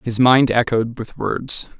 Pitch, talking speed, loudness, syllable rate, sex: 120 Hz, 165 wpm, -18 LUFS, 3.7 syllables/s, male